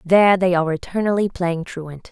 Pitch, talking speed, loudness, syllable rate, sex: 180 Hz, 170 wpm, -19 LUFS, 5.5 syllables/s, female